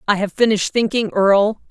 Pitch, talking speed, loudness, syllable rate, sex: 210 Hz, 175 wpm, -17 LUFS, 6.2 syllables/s, female